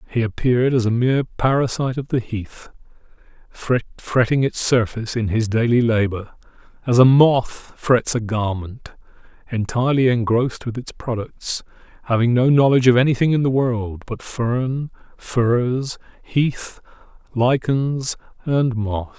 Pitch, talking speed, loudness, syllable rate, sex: 120 Hz, 130 wpm, -19 LUFS, 4.5 syllables/s, male